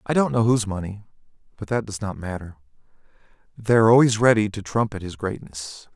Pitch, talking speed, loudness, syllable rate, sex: 105 Hz, 170 wpm, -22 LUFS, 6.1 syllables/s, male